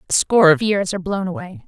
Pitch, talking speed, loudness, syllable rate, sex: 190 Hz, 250 wpm, -17 LUFS, 6.8 syllables/s, female